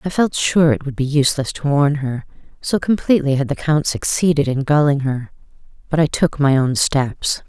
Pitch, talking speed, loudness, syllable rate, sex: 145 Hz, 200 wpm, -17 LUFS, 5.1 syllables/s, female